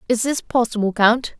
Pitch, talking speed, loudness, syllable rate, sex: 235 Hz, 170 wpm, -19 LUFS, 5.0 syllables/s, female